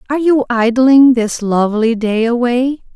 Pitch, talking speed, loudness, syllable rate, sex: 240 Hz, 140 wpm, -13 LUFS, 4.6 syllables/s, female